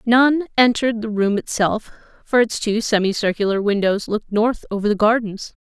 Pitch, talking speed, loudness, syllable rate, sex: 220 Hz, 160 wpm, -19 LUFS, 5.2 syllables/s, female